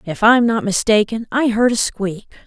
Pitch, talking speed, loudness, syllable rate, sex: 220 Hz, 195 wpm, -16 LUFS, 4.7 syllables/s, female